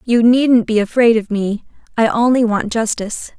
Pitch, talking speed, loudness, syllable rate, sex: 225 Hz, 175 wpm, -15 LUFS, 4.8 syllables/s, female